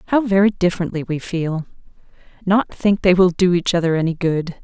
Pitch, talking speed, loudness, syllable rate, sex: 180 Hz, 170 wpm, -18 LUFS, 5.7 syllables/s, female